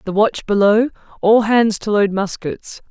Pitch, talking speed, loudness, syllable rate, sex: 210 Hz, 165 wpm, -16 LUFS, 4.2 syllables/s, female